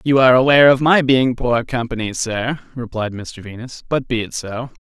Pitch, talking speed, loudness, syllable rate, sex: 125 Hz, 200 wpm, -17 LUFS, 5.1 syllables/s, male